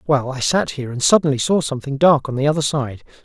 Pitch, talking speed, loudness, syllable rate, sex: 140 Hz, 240 wpm, -18 LUFS, 6.4 syllables/s, male